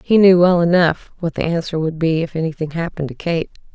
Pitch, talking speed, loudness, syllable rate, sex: 165 Hz, 225 wpm, -17 LUFS, 6.0 syllables/s, female